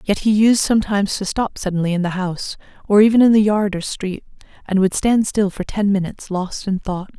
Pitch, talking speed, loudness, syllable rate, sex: 200 Hz, 225 wpm, -18 LUFS, 5.7 syllables/s, female